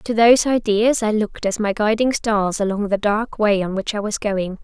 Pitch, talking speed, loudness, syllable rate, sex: 210 Hz, 235 wpm, -19 LUFS, 5.0 syllables/s, female